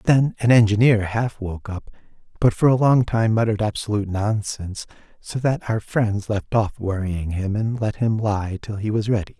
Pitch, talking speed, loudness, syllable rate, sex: 110 Hz, 190 wpm, -21 LUFS, 4.9 syllables/s, male